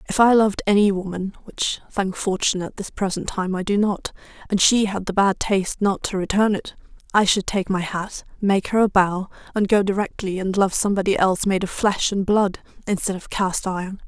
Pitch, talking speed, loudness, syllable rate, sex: 195 Hz, 205 wpm, -21 LUFS, 5.4 syllables/s, female